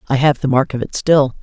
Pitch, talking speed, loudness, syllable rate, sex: 135 Hz, 295 wpm, -16 LUFS, 5.9 syllables/s, female